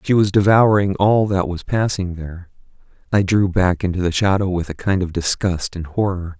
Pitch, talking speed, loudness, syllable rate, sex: 95 Hz, 195 wpm, -18 LUFS, 5.1 syllables/s, male